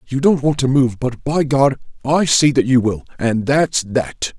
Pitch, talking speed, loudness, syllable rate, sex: 135 Hz, 220 wpm, -16 LUFS, 4.2 syllables/s, male